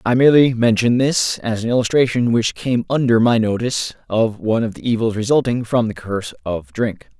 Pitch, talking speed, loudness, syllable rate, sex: 115 Hz, 190 wpm, -18 LUFS, 5.5 syllables/s, male